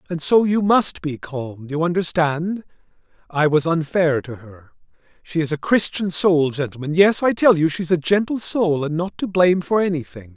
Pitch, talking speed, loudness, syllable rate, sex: 165 Hz, 195 wpm, -19 LUFS, 4.9 syllables/s, male